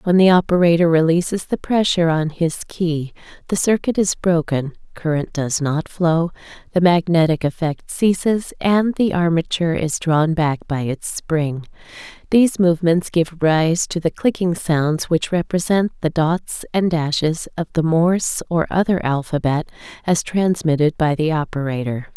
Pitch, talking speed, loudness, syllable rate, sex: 165 Hz, 150 wpm, -18 LUFS, 4.5 syllables/s, female